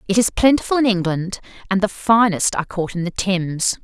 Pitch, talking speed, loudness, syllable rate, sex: 195 Hz, 205 wpm, -18 LUFS, 5.7 syllables/s, female